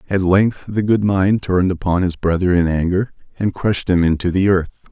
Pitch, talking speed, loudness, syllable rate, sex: 95 Hz, 205 wpm, -17 LUFS, 5.4 syllables/s, male